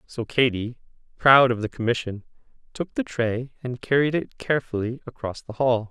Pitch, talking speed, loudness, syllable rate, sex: 120 Hz, 160 wpm, -23 LUFS, 5.0 syllables/s, male